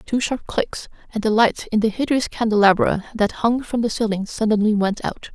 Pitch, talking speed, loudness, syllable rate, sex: 220 Hz, 200 wpm, -20 LUFS, 5.1 syllables/s, female